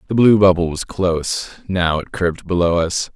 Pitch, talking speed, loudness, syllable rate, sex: 90 Hz, 190 wpm, -17 LUFS, 5.1 syllables/s, male